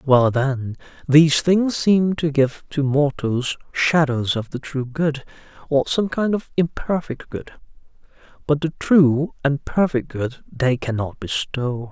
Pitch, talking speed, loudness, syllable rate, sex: 145 Hz, 145 wpm, -20 LUFS, 3.8 syllables/s, male